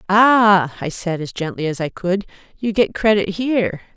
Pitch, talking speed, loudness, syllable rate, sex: 195 Hz, 180 wpm, -18 LUFS, 4.7 syllables/s, female